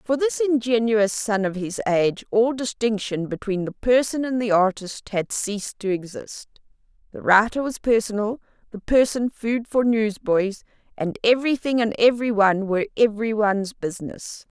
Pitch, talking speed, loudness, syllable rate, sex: 220 Hz, 150 wpm, -22 LUFS, 5.1 syllables/s, female